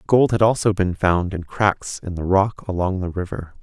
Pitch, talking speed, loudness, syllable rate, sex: 95 Hz, 215 wpm, -20 LUFS, 4.7 syllables/s, male